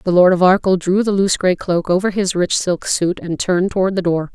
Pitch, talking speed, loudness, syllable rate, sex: 185 Hz, 260 wpm, -16 LUFS, 5.7 syllables/s, female